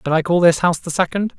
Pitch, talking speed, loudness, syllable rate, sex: 170 Hz, 305 wpm, -17 LUFS, 6.7 syllables/s, male